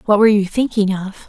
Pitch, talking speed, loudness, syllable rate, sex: 205 Hz, 235 wpm, -16 LUFS, 6.2 syllables/s, female